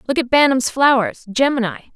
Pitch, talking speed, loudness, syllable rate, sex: 255 Hz, 155 wpm, -16 LUFS, 5.2 syllables/s, female